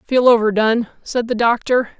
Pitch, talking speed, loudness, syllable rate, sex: 230 Hz, 150 wpm, -17 LUFS, 5.3 syllables/s, female